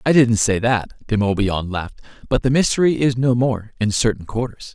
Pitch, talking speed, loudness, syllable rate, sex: 115 Hz, 190 wpm, -19 LUFS, 5.4 syllables/s, male